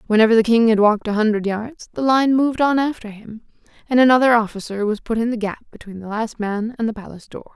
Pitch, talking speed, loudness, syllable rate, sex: 225 Hz, 240 wpm, -18 LUFS, 6.4 syllables/s, female